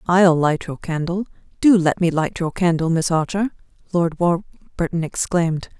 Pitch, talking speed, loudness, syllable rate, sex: 170 Hz, 155 wpm, -20 LUFS, 4.6 syllables/s, female